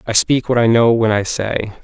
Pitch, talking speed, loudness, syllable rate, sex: 115 Hz, 260 wpm, -15 LUFS, 4.8 syllables/s, male